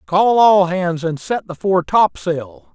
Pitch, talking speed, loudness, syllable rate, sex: 165 Hz, 175 wpm, -16 LUFS, 3.5 syllables/s, male